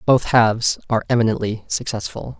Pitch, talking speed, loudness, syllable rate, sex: 115 Hz, 125 wpm, -19 LUFS, 5.7 syllables/s, male